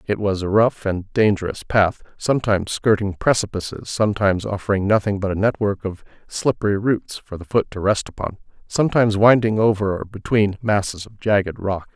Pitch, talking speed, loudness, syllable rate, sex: 100 Hz, 155 wpm, -20 LUFS, 5.5 syllables/s, male